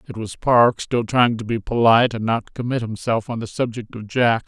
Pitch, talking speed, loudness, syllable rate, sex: 115 Hz, 230 wpm, -20 LUFS, 5.1 syllables/s, male